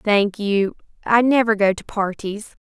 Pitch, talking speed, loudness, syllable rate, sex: 210 Hz, 160 wpm, -19 LUFS, 4.0 syllables/s, female